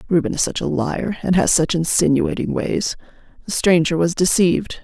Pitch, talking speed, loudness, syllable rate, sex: 175 Hz, 175 wpm, -18 LUFS, 5.1 syllables/s, female